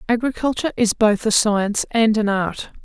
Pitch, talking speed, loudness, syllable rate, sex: 220 Hz, 170 wpm, -19 LUFS, 5.2 syllables/s, female